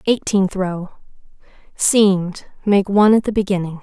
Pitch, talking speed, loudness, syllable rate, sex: 195 Hz, 110 wpm, -17 LUFS, 4.9 syllables/s, female